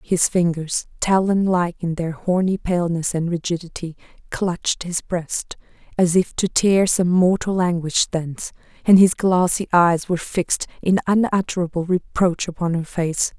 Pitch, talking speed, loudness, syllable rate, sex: 175 Hz, 150 wpm, -20 LUFS, 4.6 syllables/s, female